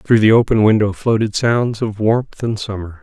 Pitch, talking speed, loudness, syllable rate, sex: 110 Hz, 200 wpm, -16 LUFS, 4.7 syllables/s, male